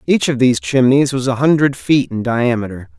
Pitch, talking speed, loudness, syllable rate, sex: 125 Hz, 200 wpm, -15 LUFS, 5.4 syllables/s, male